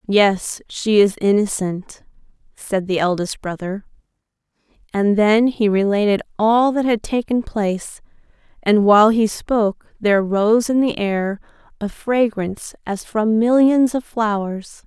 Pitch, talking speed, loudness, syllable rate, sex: 210 Hz, 135 wpm, -18 LUFS, 4.1 syllables/s, female